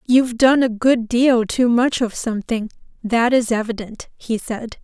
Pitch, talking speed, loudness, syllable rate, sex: 235 Hz, 175 wpm, -18 LUFS, 4.5 syllables/s, female